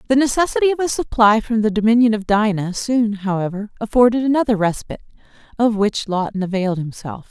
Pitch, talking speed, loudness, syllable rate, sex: 220 Hz, 165 wpm, -18 LUFS, 6.0 syllables/s, female